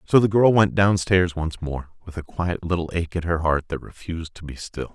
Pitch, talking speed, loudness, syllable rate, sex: 85 Hz, 245 wpm, -22 LUFS, 5.2 syllables/s, male